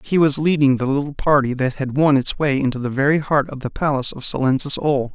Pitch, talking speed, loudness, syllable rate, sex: 140 Hz, 245 wpm, -19 LUFS, 6.0 syllables/s, male